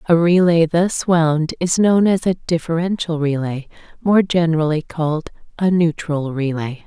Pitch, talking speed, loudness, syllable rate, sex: 165 Hz, 130 wpm, -18 LUFS, 4.5 syllables/s, female